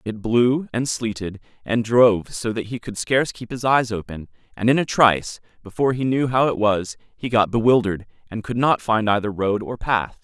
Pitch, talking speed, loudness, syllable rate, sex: 115 Hz, 210 wpm, -20 LUFS, 5.3 syllables/s, male